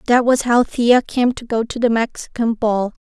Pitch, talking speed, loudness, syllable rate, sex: 235 Hz, 215 wpm, -17 LUFS, 4.6 syllables/s, female